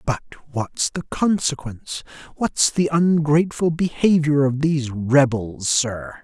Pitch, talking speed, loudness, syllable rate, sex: 145 Hz, 115 wpm, -20 LUFS, 4.1 syllables/s, male